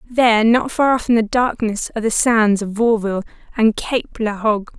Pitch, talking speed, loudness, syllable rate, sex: 225 Hz, 200 wpm, -17 LUFS, 5.3 syllables/s, female